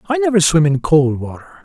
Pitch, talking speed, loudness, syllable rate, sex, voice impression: 175 Hz, 220 wpm, -14 LUFS, 5.8 syllables/s, male, masculine, very adult-like, thick, slightly refreshing, sincere, slightly kind